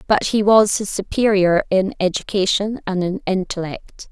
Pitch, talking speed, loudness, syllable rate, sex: 195 Hz, 145 wpm, -18 LUFS, 4.5 syllables/s, female